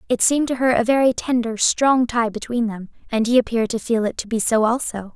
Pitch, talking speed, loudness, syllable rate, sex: 235 Hz, 245 wpm, -19 LUFS, 5.9 syllables/s, female